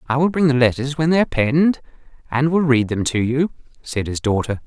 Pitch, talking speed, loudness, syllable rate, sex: 135 Hz, 230 wpm, -19 LUFS, 6.0 syllables/s, male